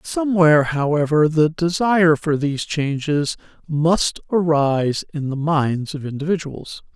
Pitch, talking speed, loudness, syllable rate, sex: 155 Hz, 120 wpm, -19 LUFS, 4.5 syllables/s, male